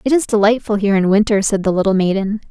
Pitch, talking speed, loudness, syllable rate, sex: 205 Hz, 240 wpm, -15 LUFS, 6.8 syllables/s, female